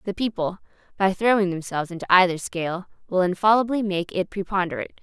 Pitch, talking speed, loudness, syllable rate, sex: 185 Hz, 155 wpm, -23 LUFS, 6.4 syllables/s, female